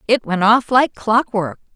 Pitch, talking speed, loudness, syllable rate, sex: 220 Hz, 205 wpm, -16 LUFS, 4.1 syllables/s, female